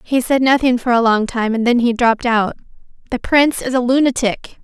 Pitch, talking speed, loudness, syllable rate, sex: 245 Hz, 220 wpm, -15 LUFS, 5.6 syllables/s, female